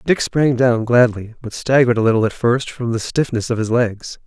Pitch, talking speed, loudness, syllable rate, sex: 120 Hz, 225 wpm, -17 LUFS, 5.2 syllables/s, male